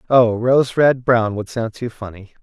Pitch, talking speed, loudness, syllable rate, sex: 115 Hz, 200 wpm, -17 LUFS, 4.6 syllables/s, male